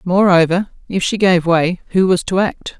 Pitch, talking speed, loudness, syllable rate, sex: 180 Hz, 195 wpm, -15 LUFS, 4.6 syllables/s, female